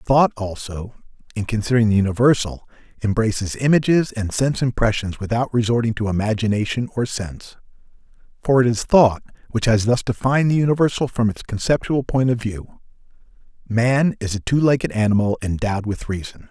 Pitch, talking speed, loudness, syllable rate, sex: 115 Hz, 155 wpm, -20 LUFS, 5.7 syllables/s, male